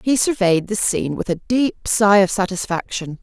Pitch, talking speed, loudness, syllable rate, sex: 200 Hz, 185 wpm, -18 LUFS, 4.8 syllables/s, female